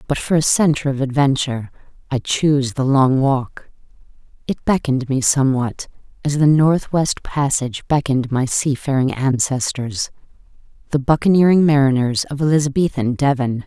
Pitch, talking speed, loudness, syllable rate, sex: 135 Hz, 125 wpm, -17 LUFS, 5.1 syllables/s, female